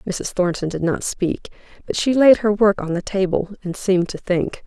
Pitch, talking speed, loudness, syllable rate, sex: 190 Hz, 220 wpm, -19 LUFS, 4.9 syllables/s, female